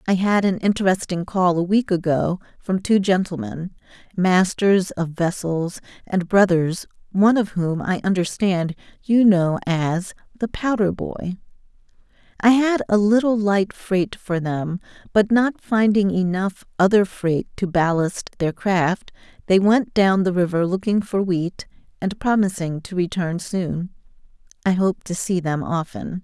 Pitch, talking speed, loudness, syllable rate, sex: 190 Hz, 145 wpm, -20 LUFS, 4.1 syllables/s, female